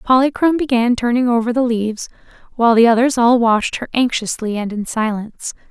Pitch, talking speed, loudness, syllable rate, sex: 235 Hz, 170 wpm, -16 LUFS, 6.1 syllables/s, female